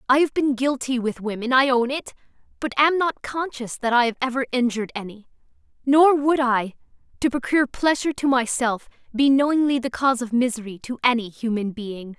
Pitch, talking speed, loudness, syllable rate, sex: 250 Hz, 175 wpm, -22 LUFS, 5.6 syllables/s, female